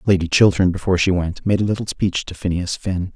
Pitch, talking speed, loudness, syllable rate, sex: 90 Hz, 230 wpm, -19 LUFS, 6.0 syllables/s, male